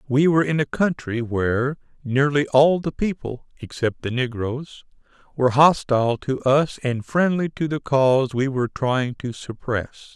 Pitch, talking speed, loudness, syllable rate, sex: 135 Hz, 160 wpm, -21 LUFS, 4.6 syllables/s, male